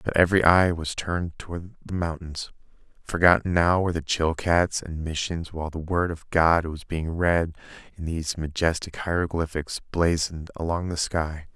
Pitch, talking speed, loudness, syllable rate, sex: 85 Hz, 160 wpm, -25 LUFS, 4.9 syllables/s, male